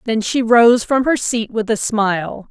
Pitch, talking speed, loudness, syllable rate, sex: 225 Hz, 215 wpm, -16 LUFS, 5.1 syllables/s, female